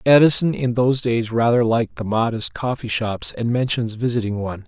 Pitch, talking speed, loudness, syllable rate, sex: 120 Hz, 180 wpm, -20 LUFS, 5.5 syllables/s, male